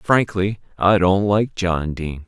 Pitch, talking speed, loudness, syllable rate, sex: 95 Hz, 160 wpm, -19 LUFS, 3.9 syllables/s, male